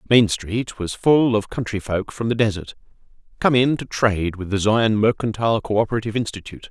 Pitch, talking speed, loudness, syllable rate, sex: 110 Hz, 180 wpm, -20 LUFS, 5.8 syllables/s, male